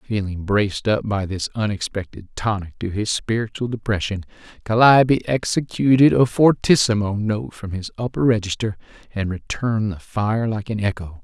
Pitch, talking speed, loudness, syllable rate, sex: 105 Hz, 145 wpm, -20 LUFS, 4.9 syllables/s, male